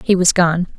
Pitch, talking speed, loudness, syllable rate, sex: 175 Hz, 230 wpm, -15 LUFS, 4.6 syllables/s, female